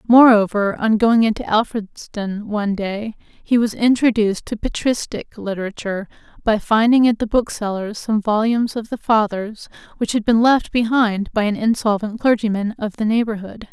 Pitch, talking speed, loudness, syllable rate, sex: 220 Hz, 155 wpm, -18 LUFS, 5.0 syllables/s, female